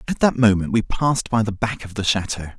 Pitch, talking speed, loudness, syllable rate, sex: 110 Hz, 255 wpm, -20 LUFS, 6.0 syllables/s, male